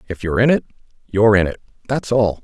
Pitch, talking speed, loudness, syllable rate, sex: 110 Hz, 220 wpm, -18 LUFS, 7.2 syllables/s, male